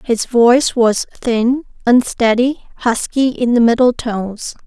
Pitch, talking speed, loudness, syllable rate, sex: 240 Hz, 130 wpm, -15 LUFS, 4.1 syllables/s, female